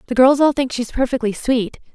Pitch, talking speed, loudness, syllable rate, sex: 250 Hz, 245 wpm, -17 LUFS, 6.1 syllables/s, female